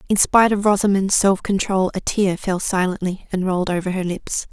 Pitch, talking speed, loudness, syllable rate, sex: 190 Hz, 200 wpm, -19 LUFS, 5.4 syllables/s, female